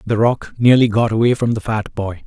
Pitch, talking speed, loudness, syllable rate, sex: 110 Hz, 240 wpm, -16 LUFS, 5.3 syllables/s, male